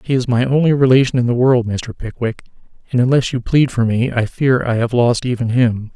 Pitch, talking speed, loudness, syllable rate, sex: 125 Hz, 230 wpm, -16 LUFS, 5.4 syllables/s, male